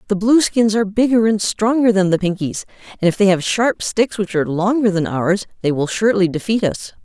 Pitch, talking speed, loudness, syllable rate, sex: 205 Hz, 215 wpm, -17 LUFS, 5.6 syllables/s, female